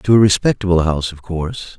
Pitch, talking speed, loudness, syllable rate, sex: 90 Hz, 200 wpm, -17 LUFS, 6.8 syllables/s, male